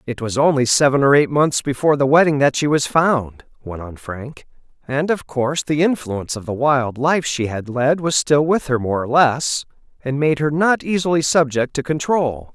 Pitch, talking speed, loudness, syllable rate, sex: 140 Hz, 210 wpm, -18 LUFS, 4.9 syllables/s, male